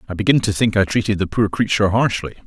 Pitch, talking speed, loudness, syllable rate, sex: 105 Hz, 245 wpm, -18 LUFS, 6.9 syllables/s, male